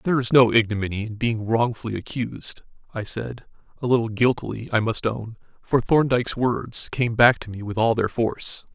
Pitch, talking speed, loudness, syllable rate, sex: 115 Hz, 180 wpm, -22 LUFS, 5.3 syllables/s, male